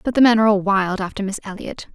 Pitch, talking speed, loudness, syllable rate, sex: 205 Hz, 280 wpm, -18 LUFS, 6.9 syllables/s, female